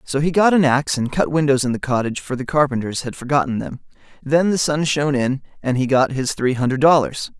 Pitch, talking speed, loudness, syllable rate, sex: 135 Hz, 235 wpm, -19 LUFS, 6.0 syllables/s, male